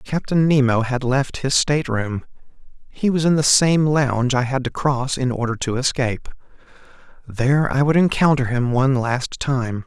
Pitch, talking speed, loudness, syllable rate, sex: 135 Hz, 170 wpm, -19 LUFS, 4.8 syllables/s, male